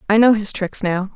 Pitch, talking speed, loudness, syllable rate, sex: 205 Hz, 260 wpm, -17 LUFS, 5.2 syllables/s, female